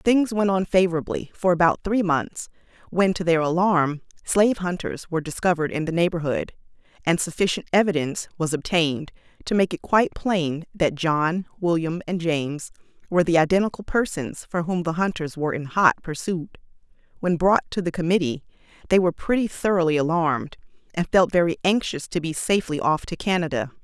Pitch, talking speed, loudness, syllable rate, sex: 170 Hz, 165 wpm, -23 LUFS, 5.7 syllables/s, female